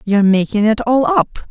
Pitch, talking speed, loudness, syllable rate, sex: 225 Hz, 200 wpm, -14 LUFS, 5.0 syllables/s, female